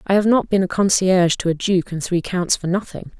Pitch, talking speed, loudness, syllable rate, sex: 185 Hz, 265 wpm, -18 LUFS, 5.7 syllables/s, female